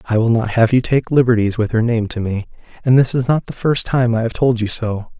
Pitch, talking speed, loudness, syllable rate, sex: 115 Hz, 275 wpm, -17 LUFS, 5.6 syllables/s, male